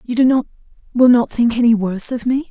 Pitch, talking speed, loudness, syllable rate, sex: 240 Hz, 215 wpm, -15 LUFS, 6.3 syllables/s, female